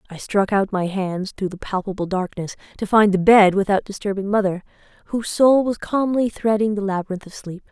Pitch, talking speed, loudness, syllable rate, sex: 200 Hz, 195 wpm, -20 LUFS, 5.5 syllables/s, female